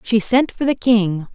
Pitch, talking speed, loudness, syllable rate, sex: 225 Hz, 225 wpm, -17 LUFS, 4.1 syllables/s, female